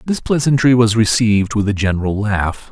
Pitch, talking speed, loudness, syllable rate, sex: 110 Hz, 175 wpm, -15 LUFS, 5.5 syllables/s, male